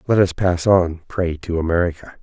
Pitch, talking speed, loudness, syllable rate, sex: 85 Hz, 190 wpm, -19 LUFS, 5.1 syllables/s, male